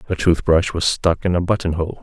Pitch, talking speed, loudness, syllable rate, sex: 85 Hz, 205 wpm, -18 LUFS, 6.0 syllables/s, male